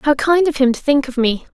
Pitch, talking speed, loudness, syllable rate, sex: 275 Hz, 310 wpm, -16 LUFS, 5.5 syllables/s, female